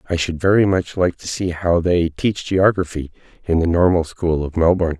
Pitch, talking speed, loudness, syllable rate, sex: 85 Hz, 205 wpm, -18 LUFS, 5.2 syllables/s, male